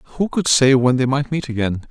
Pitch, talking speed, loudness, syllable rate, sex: 135 Hz, 250 wpm, -17 LUFS, 4.8 syllables/s, male